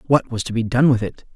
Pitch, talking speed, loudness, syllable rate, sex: 120 Hz, 310 wpm, -19 LUFS, 6.3 syllables/s, male